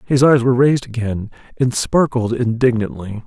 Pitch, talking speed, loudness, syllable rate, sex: 120 Hz, 145 wpm, -17 LUFS, 5.2 syllables/s, male